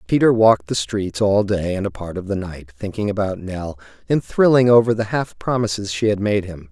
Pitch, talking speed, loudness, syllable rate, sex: 100 Hz, 225 wpm, -19 LUFS, 5.3 syllables/s, male